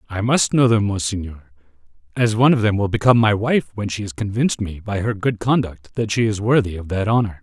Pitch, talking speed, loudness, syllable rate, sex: 105 Hz, 235 wpm, -19 LUFS, 6.0 syllables/s, male